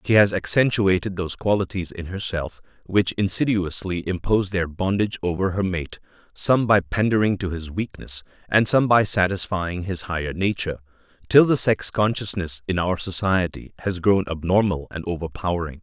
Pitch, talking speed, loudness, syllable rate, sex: 95 Hz, 150 wpm, -22 LUFS, 5.2 syllables/s, male